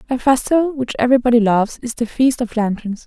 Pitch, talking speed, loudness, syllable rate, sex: 240 Hz, 195 wpm, -17 LUFS, 6.3 syllables/s, female